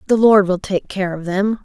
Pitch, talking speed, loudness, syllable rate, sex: 195 Hz, 255 wpm, -17 LUFS, 4.9 syllables/s, female